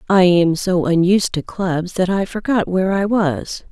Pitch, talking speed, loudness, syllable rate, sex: 185 Hz, 195 wpm, -17 LUFS, 4.6 syllables/s, female